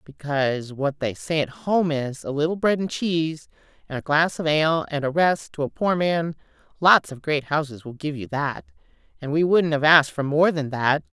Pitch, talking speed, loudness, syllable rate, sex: 155 Hz, 215 wpm, -22 LUFS, 5.0 syllables/s, female